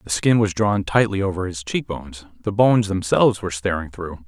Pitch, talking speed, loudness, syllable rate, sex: 95 Hz, 195 wpm, -20 LUFS, 5.7 syllables/s, male